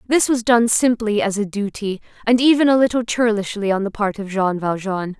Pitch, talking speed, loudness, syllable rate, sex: 215 Hz, 210 wpm, -18 LUFS, 5.2 syllables/s, female